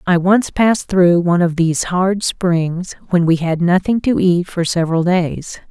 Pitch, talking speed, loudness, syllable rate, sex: 180 Hz, 190 wpm, -15 LUFS, 4.5 syllables/s, female